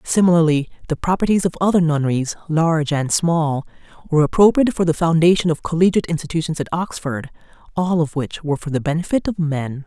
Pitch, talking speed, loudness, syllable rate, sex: 165 Hz, 170 wpm, -19 LUFS, 6.3 syllables/s, female